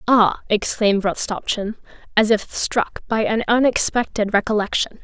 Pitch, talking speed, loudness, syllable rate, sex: 215 Hz, 120 wpm, -19 LUFS, 4.6 syllables/s, female